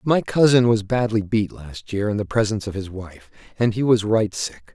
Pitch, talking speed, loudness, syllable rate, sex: 105 Hz, 230 wpm, -21 LUFS, 5.0 syllables/s, male